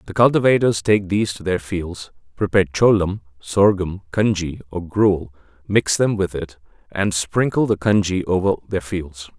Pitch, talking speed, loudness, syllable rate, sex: 95 Hz, 155 wpm, -19 LUFS, 4.8 syllables/s, male